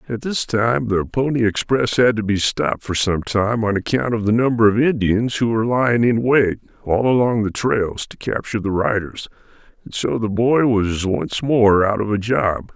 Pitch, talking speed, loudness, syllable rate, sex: 110 Hz, 205 wpm, -18 LUFS, 4.8 syllables/s, male